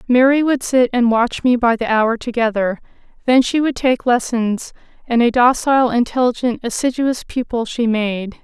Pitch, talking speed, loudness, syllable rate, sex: 240 Hz, 165 wpm, -17 LUFS, 4.8 syllables/s, female